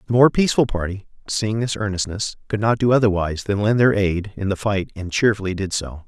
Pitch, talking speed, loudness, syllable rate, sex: 105 Hz, 215 wpm, -20 LUFS, 5.9 syllables/s, male